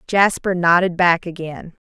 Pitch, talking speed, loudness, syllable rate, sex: 175 Hz, 130 wpm, -16 LUFS, 4.3 syllables/s, female